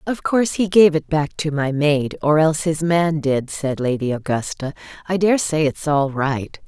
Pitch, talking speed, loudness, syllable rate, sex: 155 Hz, 200 wpm, -19 LUFS, 4.6 syllables/s, female